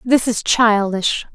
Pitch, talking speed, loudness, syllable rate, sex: 220 Hz, 135 wpm, -16 LUFS, 3.4 syllables/s, female